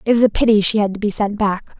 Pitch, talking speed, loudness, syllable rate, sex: 210 Hz, 335 wpm, -17 LUFS, 6.5 syllables/s, female